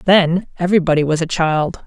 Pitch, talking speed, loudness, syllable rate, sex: 170 Hz, 160 wpm, -16 LUFS, 5.2 syllables/s, female